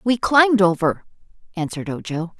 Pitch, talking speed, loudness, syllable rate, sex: 195 Hz, 125 wpm, -19 LUFS, 5.5 syllables/s, female